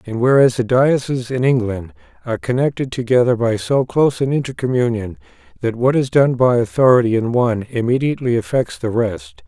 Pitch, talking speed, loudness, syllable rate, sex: 125 Hz, 165 wpm, -17 LUFS, 5.7 syllables/s, male